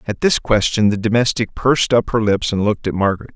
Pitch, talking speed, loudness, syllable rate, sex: 110 Hz, 230 wpm, -17 LUFS, 6.3 syllables/s, male